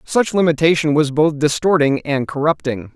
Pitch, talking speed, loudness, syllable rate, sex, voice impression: 150 Hz, 140 wpm, -16 LUFS, 4.9 syllables/s, male, masculine, adult-like, thick, powerful, bright, hard, clear, cool, intellectual, wild, lively, strict, intense